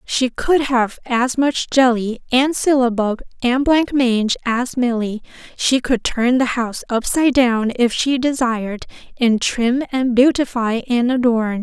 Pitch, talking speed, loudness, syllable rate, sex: 245 Hz, 150 wpm, -17 LUFS, 4.1 syllables/s, female